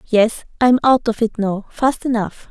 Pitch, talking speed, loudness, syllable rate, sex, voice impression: 225 Hz, 170 wpm, -17 LUFS, 4.5 syllables/s, female, feminine, slightly young, slightly soft, cute, friendly, slightly kind